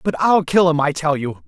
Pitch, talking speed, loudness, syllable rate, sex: 155 Hz, 285 wpm, -17 LUFS, 5.4 syllables/s, male